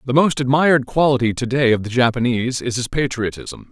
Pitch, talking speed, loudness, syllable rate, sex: 125 Hz, 195 wpm, -18 LUFS, 5.9 syllables/s, male